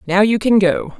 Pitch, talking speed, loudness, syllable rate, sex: 205 Hz, 240 wpm, -15 LUFS, 4.8 syllables/s, female